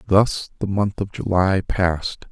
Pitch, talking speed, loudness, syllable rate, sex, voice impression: 95 Hz, 155 wpm, -21 LUFS, 4.1 syllables/s, male, masculine, adult-like, soft, slightly cool, sincere, calm, slightly kind